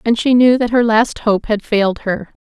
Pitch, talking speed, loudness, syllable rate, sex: 220 Hz, 245 wpm, -14 LUFS, 4.9 syllables/s, female